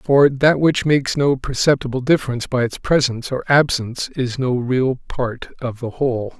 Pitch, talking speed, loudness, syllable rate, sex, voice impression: 130 Hz, 180 wpm, -19 LUFS, 4.9 syllables/s, male, very masculine, very adult-like, slightly muffled, cool, slightly refreshing, sincere, slightly calm, slightly kind